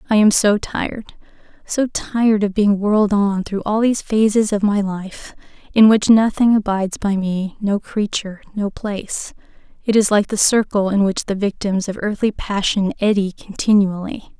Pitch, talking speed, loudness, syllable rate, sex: 205 Hz, 165 wpm, -18 LUFS, 4.8 syllables/s, female